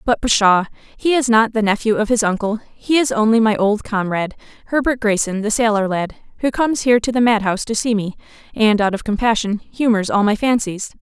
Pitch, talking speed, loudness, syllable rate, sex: 220 Hz, 210 wpm, -17 LUFS, 5.8 syllables/s, female